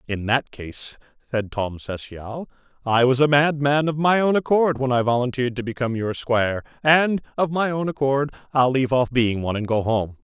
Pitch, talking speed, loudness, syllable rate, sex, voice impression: 130 Hz, 200 wpm, -21 LUFS, 5.2 syllables/s, male, very masculine, very adult-like, middle-aged, thick, tensed, slightly powerful, slightly bright, slightly soft, clear, very fluent, cool, intellectual, slightly refreshing, very sincere, calm, mature, friendly, reassuring, slightly unique, slightly elegant, wild, slightly sweet, very lively, slightly strict, slightly intense